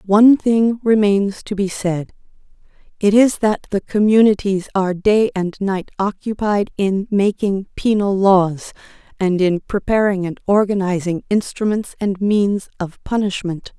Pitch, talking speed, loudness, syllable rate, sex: 200 Hz, 130 wpm, -17 LUFS, 4.2 syllables/s, female